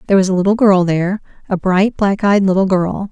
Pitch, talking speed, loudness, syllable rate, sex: 195 Hz, 230 wpm, -14 LUFS, 6.0 syllables/s, female